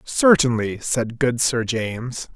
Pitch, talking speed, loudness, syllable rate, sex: 120 Hz, 125 wpm, -20 LUFS, 3.6 syllables/s, male